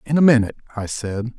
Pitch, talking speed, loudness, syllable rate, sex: 120 Hz, 215 wpm, -19 LUFS, 6.7 syllables/s, male